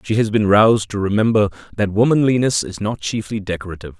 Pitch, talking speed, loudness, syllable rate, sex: 105 Hz, 180 wpm, -17 LUFS, 6.7 syllables/s, male